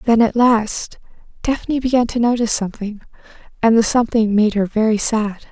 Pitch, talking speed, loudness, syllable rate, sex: 225 Hz, 165 wpm, -17 LUFS, 5.8 syllables/s, female